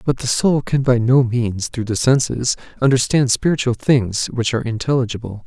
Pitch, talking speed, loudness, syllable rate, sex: 125 Hz, 175 wpm, -18 LUFS, 5.1 syllables/s, male